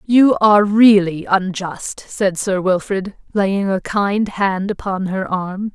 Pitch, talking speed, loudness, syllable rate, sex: 195 Hz, 145 wpm, -17 LUFS, 3.5 syllables/s, female